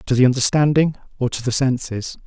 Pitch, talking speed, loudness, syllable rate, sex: 130 Hz, 185 wpm, -19 LUFS, 6.0 syllables/s, male